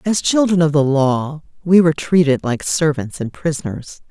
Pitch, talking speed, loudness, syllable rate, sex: 155 Hz, 175 wpm, -16 LUFS, 4.8 syllables/s, female